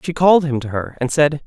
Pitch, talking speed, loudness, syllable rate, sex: 145 Hz, 285 wpm, -17 LUFS, 6.0 syllables/s, male